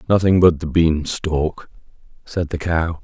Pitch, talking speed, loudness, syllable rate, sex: 80 Hz, 160 wpm, -18 LUFS, 4.0 syllables/s, male